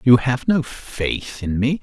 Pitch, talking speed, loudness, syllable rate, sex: 125 Hz, 195 wpm, -20 LUFS, 3.5 syllables/s, male